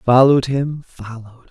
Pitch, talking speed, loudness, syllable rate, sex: 130 Hz, 120 wpm, -16 LUFS, 5.8 syllables/s, male